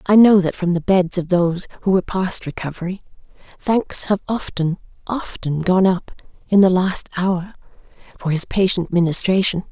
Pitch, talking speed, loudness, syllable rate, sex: 185 Hz, 160 wpm, -18 LUFS, 4.9 syllables/s, female